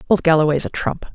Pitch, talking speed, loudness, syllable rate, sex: 165 Hz, 210 wpm, -18 LUFS, 6.2 syllables/s, female